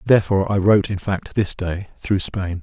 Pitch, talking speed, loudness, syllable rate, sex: 95 Hz, 205 wpm, -20 LUFS, 5.4 syllables/s, male